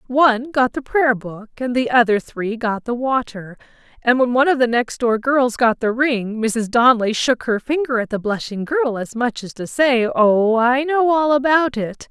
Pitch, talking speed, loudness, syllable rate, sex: 245 Hz, 215 wpm, -18 LUFS, 4.6 syllables/s, female